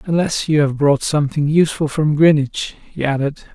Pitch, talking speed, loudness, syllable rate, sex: 150 Hz, 170 wpm, -17 LUFS, 5.3 syllables/s, male